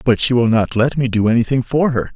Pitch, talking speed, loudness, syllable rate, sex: 120 Hz, 280 wpm, -16 LUFS, 5.9 syllables/s, male